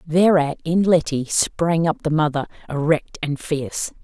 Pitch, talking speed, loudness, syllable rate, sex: 155 Hz, 150 wpm, -20 LUFS, 4.3 syllables/s, female